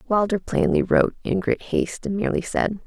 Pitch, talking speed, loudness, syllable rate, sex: 200 Hz, 190 wpm, -22 LUFS, 5.8 syllables/s, female